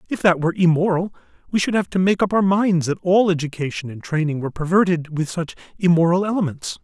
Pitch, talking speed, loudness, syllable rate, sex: 175 Hz, 200 wpm, -20 LUFS, 6.2 syllables/s, male